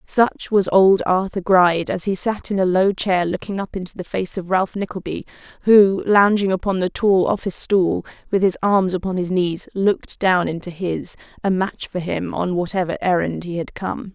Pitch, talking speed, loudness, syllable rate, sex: 185 Hz, 200 wpm, -19 LUFS, 4.9 syllables/s, female